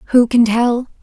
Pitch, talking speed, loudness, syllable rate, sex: 235 Hz, 175 wpm, -14 LUFS, 3.5 syllables/s, female